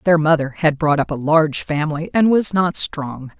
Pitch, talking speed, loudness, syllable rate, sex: 155 Hz, 210 wpm, -17 LUFS, 5.0 syllables/s, female